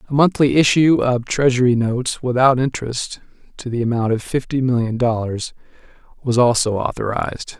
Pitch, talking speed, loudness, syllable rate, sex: 125 Hz, 140 wpm, -18 LUFS, 5.4 syllables/s, male